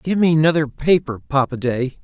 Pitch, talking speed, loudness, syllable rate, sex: 145 Hz, 175 wpm, -18 LUFS, 4.7 syllables/s, male